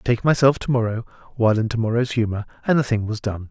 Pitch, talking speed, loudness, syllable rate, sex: 115 Hz, 240 wpm, -21 LUFS, 6.3 syllables/s, male